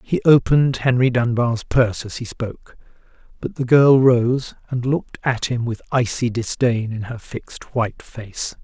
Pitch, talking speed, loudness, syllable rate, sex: 120 Hz, 165 wpm, -19 LUFS, 4.7 syllables/s, male